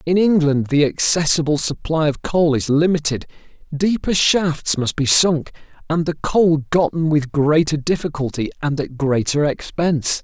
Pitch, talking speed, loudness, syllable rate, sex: 155 Hz, 145 wpm, -18 LUFS, 4.5 syllables/s, male